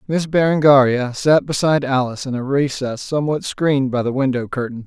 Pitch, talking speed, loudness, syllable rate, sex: 135 Hz, 175 wpm, -18 LUFS, 5.8 syllables/s, male